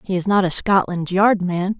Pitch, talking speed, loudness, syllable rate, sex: 185 Hz, 235 wpm, -18 LUFS, 4.8 syllables/s, female